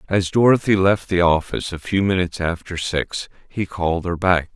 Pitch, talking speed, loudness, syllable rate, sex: 90 Hz, 185 wpm, -20 LUFS, 5.3 syllables/s, male